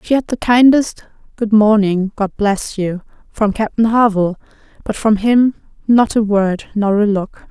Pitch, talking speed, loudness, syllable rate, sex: 210 Hz, 170 wpm, -15 LUFS, 4.3 syllables/s, female